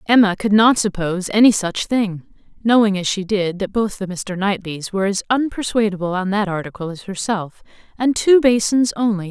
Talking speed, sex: 195 wpm, female